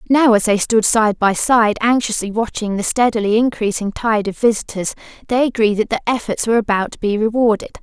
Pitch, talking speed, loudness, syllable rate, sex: 220 Hz, 190 wpm, -16 LUFS, 5.7 syllables/s, female